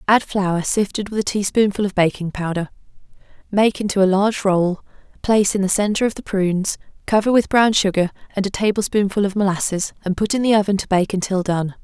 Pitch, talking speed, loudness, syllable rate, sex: 200 Hz, 200 wpm, -19 LUFS, 5.9 syllables/s, female